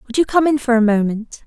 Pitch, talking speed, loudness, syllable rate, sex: 245 Hz, 285 wpm, -16 LUFS, 7.4 syllables/s, female